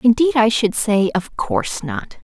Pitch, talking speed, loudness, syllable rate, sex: 225 Hz, 180 wpm, -18 LUFS, 4.2 syllables/s, female